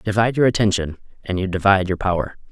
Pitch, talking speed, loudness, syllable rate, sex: 100 Hz, 190 wpm, -19 LUFS, 7.0 syllables/s, male